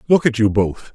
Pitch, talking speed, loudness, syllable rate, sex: 120 Hz, 255 wpm, -17 LUFS, 5.2 syllables/s, male